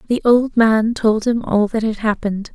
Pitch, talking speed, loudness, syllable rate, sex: 220 Hz, 210 wpm, -17 LUFS, 4.7 syllables/s, female